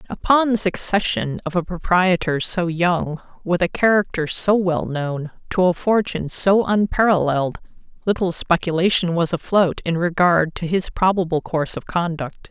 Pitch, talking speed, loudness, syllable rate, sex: 175 Hz, 150 wpm, -19 LUFS, 4.7 syllables/s, female